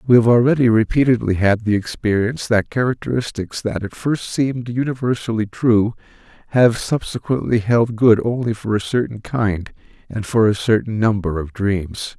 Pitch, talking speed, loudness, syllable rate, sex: 110 Hz, 155 wpm, -18 LUFS, 5.0 syllables/s, male